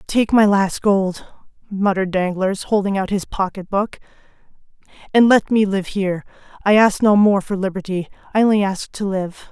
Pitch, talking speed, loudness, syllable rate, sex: 195 Hz, 165 wpm, -18 LUFS, 5.0 syllables/s, female